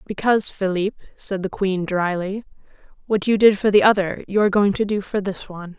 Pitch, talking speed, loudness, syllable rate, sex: 195 Hz, 210 wpm, -20 LUFS, 5.7 syllables/s, female